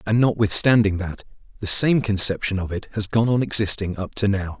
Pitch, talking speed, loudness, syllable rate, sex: 105 Hz, 195 wpm, -20 LUFS, 5.4 syllables/s, male